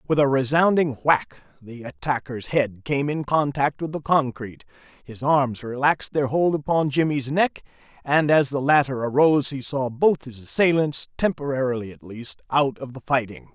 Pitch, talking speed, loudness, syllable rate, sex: 135 Hz, 170 wpm, -22 LUFS, 4.9 syllables/s, male